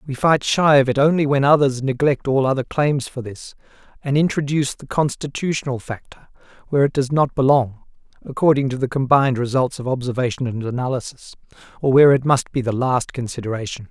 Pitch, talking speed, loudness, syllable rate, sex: 135 Hz, 175 wpm, -19 LUFS, 5.9 syllables/s, male